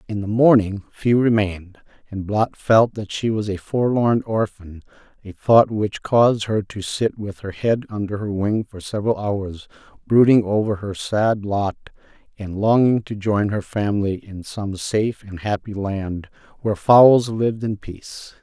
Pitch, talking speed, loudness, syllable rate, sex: 105 Hz, 170 wpm, -20 LUFS, 4.4 syllables/s, male